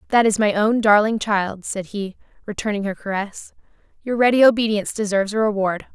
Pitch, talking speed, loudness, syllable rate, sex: 210 Hz, 170 wpm, -19 LUFS, 5.9 syllables/s, female